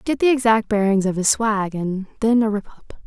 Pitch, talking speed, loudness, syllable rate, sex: 215 Hz, 255 wpm, -19 LUFS, 5.7 syllables/s, female